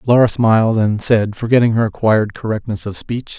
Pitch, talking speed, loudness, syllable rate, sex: 110 Hz, 175 wpm, -16 LUFS, 5.5 syllables/s, male